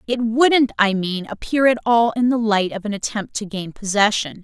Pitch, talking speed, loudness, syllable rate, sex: 220 Hz, 215 wpm, -19 LUFS, 4.8 syllables/s, female